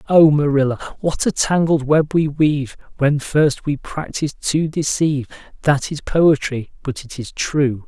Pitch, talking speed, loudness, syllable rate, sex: 145 Hz, 160 wpm, -18 LUFS, 4.4 syllables/s, male